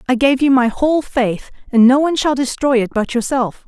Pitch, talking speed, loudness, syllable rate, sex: 255 Hz, 230 wpm, -15 LUFS, 5.5 syllables/s, female